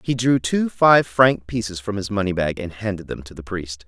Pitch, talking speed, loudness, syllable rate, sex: 105 Hz, 245 wpm, -20 LUFS, 5.0 syllables/s, male